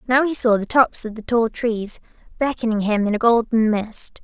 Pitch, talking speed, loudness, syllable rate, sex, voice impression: 230 Hz, 215 wpm, -19 LUFS, 4.9 syllables/s, female, feminine, young, tensed, powerful, bright, clear, slightly nasal, cute, friendly, slightly sweet, lively, slightly intense